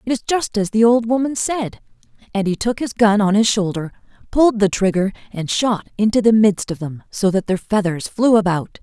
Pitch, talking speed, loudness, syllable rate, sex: 210 Hz, 215 wpm, -18 LUFS, 4.9 syllables/s, female